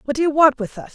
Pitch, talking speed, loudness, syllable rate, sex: 275 Hz, 380 wpm, -16 LUFS, 7.1 syllables/s, female